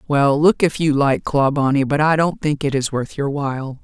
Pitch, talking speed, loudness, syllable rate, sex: 145 Hz, 235 wpm, -18 LUFS, 4.9 syllables/s, female